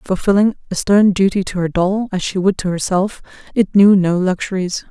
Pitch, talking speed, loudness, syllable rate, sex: 190 Hz, 195 wpm, -16 LUFS, 5.2 syllables/s, female